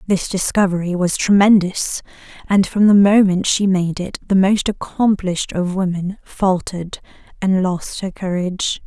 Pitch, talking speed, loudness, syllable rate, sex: 190 Hz, 140 wpm, -17 LUFS, 4.5 syllables/s, female